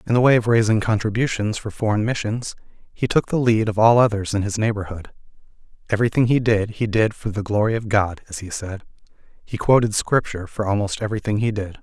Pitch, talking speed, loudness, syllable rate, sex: 110 Hz, 205 wpm, -20 LUFS, 6.1 syllables/s, male